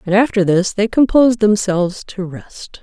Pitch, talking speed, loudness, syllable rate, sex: 200 Hz, 170 wpm, -15 LUFS, 4.9 syllables/s, female